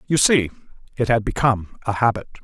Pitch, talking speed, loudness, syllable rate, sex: 115 Hz, 175 wpm, -20 LUFS, 6.0 syllables/s, male